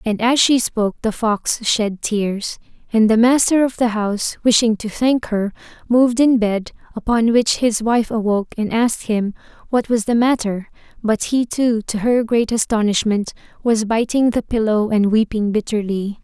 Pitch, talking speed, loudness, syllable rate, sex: 225 Hz, 175 wpm, -18 LUFS, 4.6 syllables/s, female